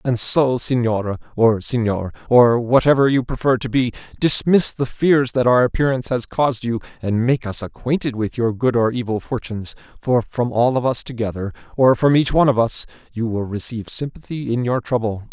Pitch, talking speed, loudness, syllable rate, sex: 120 Hz, 190 wpm, -19 LUFS, 5.4 syllables/s, male